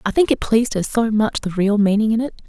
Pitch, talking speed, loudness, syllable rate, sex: 215 Hz, 290 wpm, -18 LUFS, 6.2 syllables/s, female